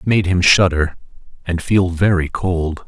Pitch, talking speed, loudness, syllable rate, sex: 90 Hz, 165 wpm, -16 LUFS, 4.3 syllables/s, male